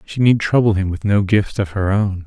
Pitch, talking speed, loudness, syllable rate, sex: 100 Hz, 265 wpm, -17 LUFS, 5.1 syllables/s, male